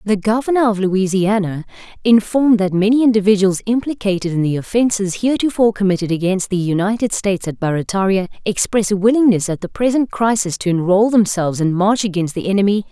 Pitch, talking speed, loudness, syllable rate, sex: 200 Hz, 165 wpm, -16 LUFS, 6.1 syllables/s, female